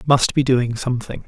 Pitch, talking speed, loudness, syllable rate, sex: 125 Hz, 190 wpm, -19 LUFS, 5.1 syllables/s, male